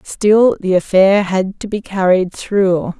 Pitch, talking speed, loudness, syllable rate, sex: 195 Hz, 160 wpm, -14 LUFS, 3.6 syllables/s, female